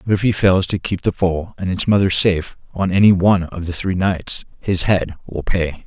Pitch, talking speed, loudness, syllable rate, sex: 90 Hz, 235 wpm, -18 LUFS, 5.1 syllables/s, male